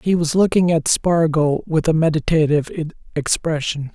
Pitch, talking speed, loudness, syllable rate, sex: 160 Hz, 135 wpm, -18 LUFS, 4.7 syllables/s, male